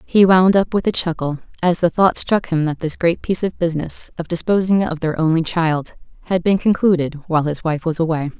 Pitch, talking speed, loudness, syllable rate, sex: 170 Hz, 220 wpm, -18 LUFS, 5.5 syllables/s, female